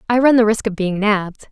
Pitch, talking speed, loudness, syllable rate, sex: 210 Hz, 275 wpm, -16 LUFS, 6.1 syllables/s, female